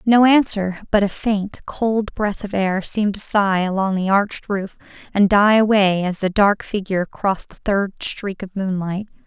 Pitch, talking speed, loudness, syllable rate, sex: 200 Hz, 190 wpm, -19 LUFS, 4.5 syllables/s, female